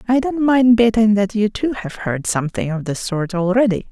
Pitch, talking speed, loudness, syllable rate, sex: 215 Hz, 215 wpm, -17 LUFS, 5.1 syllables/s, female